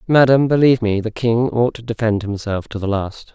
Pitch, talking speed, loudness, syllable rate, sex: 115 Hz, 215 wpm, -17 LUFS, 5.6 syllables/s, male